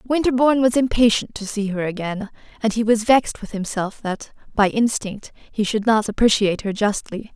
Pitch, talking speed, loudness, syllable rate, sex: 220 Hz, 180 wpm, -20 LUFS, 5.3 syllables/s, female